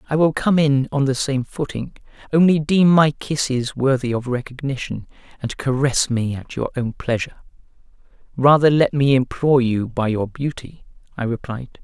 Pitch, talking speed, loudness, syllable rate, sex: 135 Hz, 160 wpm, -19 LUFS, 5.0 syllables/s, male